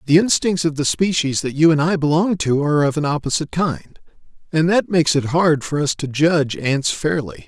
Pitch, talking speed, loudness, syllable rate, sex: 155 Hz, 215 wpm, -18 LUFS, 5.4 syllables/s, male